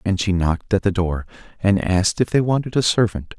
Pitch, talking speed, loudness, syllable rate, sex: 100 Hz, 230 wpm, -20 LUFS, 5.8 syllables/s, male